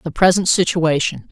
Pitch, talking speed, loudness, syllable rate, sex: 170 Hz, 135 wpm, -16 LUFS, 5.0 syllables/s, female